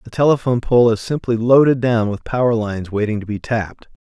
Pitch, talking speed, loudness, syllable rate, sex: 115 Hz, 205 wpm, -17 LUFS, 6.0 syllables/s, male